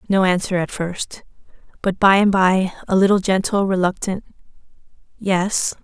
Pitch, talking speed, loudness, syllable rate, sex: 190 Hz, 135 wpm, -19 LUFS, 4.6 syllables/s, female